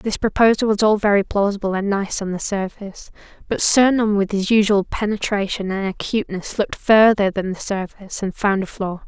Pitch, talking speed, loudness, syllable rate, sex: 205 Hz, 190 wpm, -19 LUFS, 5.6 syllables/s, female